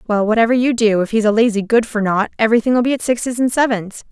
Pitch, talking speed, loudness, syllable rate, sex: 225 Hz, 250 wpm, -16 LUFS, 6.5 syllables/s, female